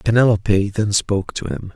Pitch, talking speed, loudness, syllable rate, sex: 105 Hz, 170 wpm, -19 LUFS, 5.5 syllables/s, male